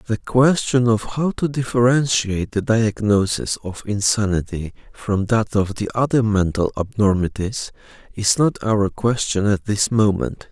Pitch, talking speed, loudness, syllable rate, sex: 110 Hz, 135 wpm, -19 LUFS, 4.2 syllables/s, male